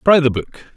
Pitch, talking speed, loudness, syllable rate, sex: 145 Hz, 235 wpm, -16 LUFS, 4.6 syllables/s, male